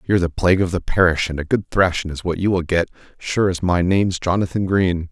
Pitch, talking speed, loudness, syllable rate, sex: 90 Hz, 245 wpm, -19 LUFS, 5.9 syllables/s, male